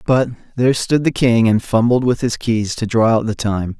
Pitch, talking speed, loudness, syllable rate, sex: 115 Hz, 235 wpm, -16 LUFS, 5.0 syllables/s, male